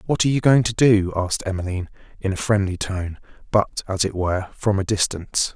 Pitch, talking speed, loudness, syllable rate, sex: 100 Hz, 205 wpm, -21 LUFS, 6.1 syllables/s, male